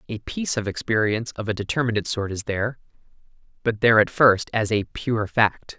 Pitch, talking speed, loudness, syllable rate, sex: 110 Hz, 185 wpm, -22 LUFS, 5.9 syllables/s, male